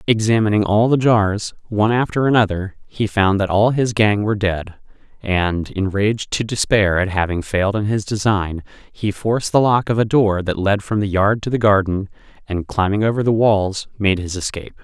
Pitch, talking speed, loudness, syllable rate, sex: 105 Hz, 195 wpm, -18 LUFS, 5.1 syllables/s, male